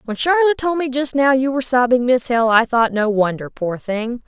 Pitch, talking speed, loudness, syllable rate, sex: 250 Hz, 240 wpm, -17 LUFS, 5.3 syllables/s, female